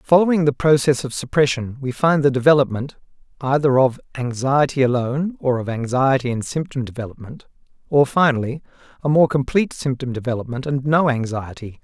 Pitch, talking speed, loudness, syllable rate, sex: 135 Hz, 145 wpm, -19 LUFS, 5.6 syllables/s, male